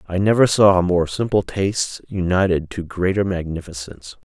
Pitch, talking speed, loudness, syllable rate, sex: 90 Hz, 140 wpm, -19 LUFS, 5.0 syllables/s, male